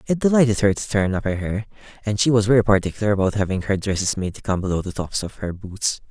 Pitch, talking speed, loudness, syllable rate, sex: 100 Hz, 255 wpm, -21 LUFS, 6.5 syllables/s, male